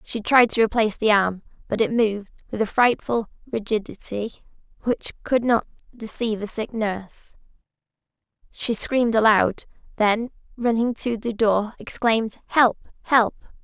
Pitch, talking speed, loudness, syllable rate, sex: 220 Hz, 130 wpm, -22 LUFS, 4.8 syllables/s, female